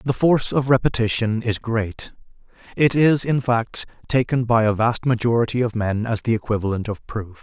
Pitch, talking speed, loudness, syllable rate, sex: 115 Hz, 180 wpm, -20 LUFS, 5.0 syllables/s, male